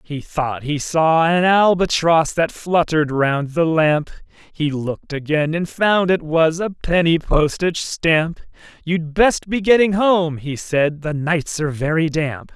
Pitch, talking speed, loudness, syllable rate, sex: 160 Hz, 160 wpm, -18 LUFS, 4.0 syllables/s, male